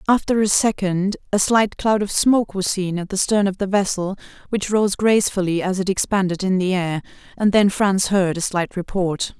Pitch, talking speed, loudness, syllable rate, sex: 195 Hz, 205 wpm, -19 LUFS, 5.0 syllables/s, female